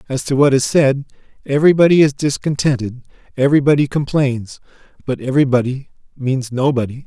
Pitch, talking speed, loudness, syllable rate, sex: 135 Hz, 120 wpm, -16 LUFS, 5.9 syllables/s, male